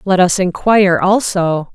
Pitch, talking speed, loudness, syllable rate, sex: 185 Hz, 140 wpm, -13 LUFS, 4.2 syllables/s, female